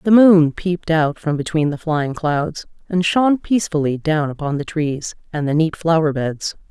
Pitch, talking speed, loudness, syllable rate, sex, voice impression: 160 Hz, 190 wpm, -18 LUFS, 4.8 syllables/s, female, gender-neutral, adult-like, slightly sincere, calm, friendly, reassuring, slightly kind